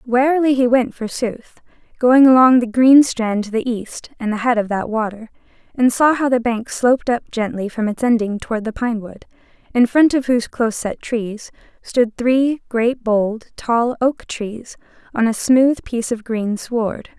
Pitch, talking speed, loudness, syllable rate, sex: 235 Hz, 190 wpm, -17 LUFS, 4.5 syllables/s, female